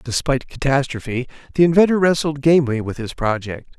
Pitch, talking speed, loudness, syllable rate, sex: 135 Hz, 145 wpm, -19 LUFS, 5.9 syllables/s, male